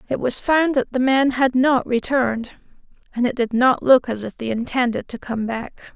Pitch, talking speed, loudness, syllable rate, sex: 250 Hz, 210 wpm, -20 LUFS, 4.9 syllables/s, female